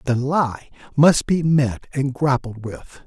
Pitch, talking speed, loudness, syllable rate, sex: 135 Hz, 155 wpm, -19 LUFS, 3.5 syllables/s, male